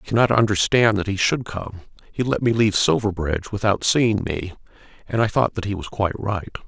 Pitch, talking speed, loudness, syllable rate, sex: 105 Hz, 200 wpm, -21 LUFS, 5.9 syllables/s, male